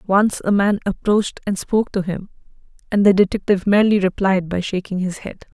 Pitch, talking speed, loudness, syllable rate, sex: 195 Hz, 180 wpm, -18 LUFS, 5.9 syllables/s, female